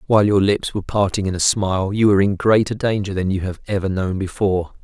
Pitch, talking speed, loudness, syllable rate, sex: 100 Hz, 235 wpm, -19 LUFS, 6.4 syllables/s, male